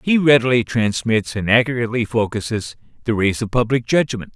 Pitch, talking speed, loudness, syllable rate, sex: 115 Hz, 150 wpm, -18 LUFS, 5.6 syllables/s, male